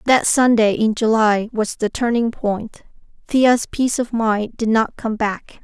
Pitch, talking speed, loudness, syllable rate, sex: 225 Hz, 170 wpm, -18 LUFS, 4.0 syllables/s, female